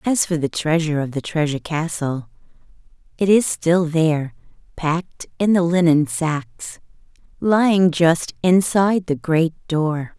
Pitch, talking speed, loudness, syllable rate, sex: 165 Hz, 135 wpm, -19 LUFS, 4.3 syllables/s, female